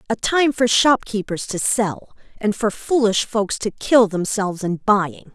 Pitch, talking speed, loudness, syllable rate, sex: 210 Hz, 170 wpm, -19 LUFS, 4.0 syllables/s, female